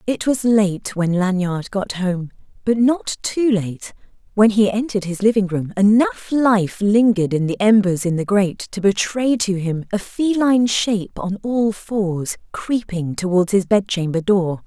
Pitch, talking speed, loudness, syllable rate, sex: 200 Hz, 170 wpm, -18 LUFS, 4.3 syllables/s, female